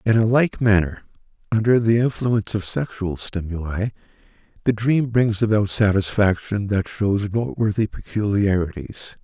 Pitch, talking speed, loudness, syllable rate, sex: 105 Hz, 125 wpm, -21 LUFS, 4.7 syllables/s, male